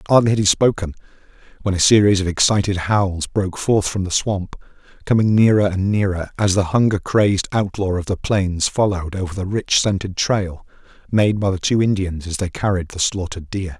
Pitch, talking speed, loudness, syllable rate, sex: 95 Hz, 190 wpm, -18 LUFS, 5.4 syllables/s, male